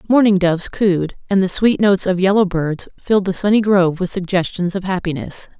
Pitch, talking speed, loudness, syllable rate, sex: 190 Hz, 195 wpm, -17 LUFS, 5.6 syllables/s, female